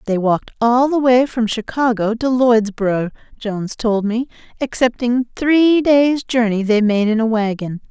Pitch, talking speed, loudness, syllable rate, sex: 235 Hz, 160 wpm, -16 LUFS, 4.4 syllables/s, female